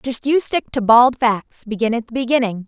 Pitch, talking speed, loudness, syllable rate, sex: 240 Hz, 225 wpm, -17 LUFS, 4.9 syllables/s, female